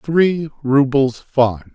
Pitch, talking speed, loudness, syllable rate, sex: 140 Hz, 105 wpm, -17 LUFS, 2.5 syllables/s, male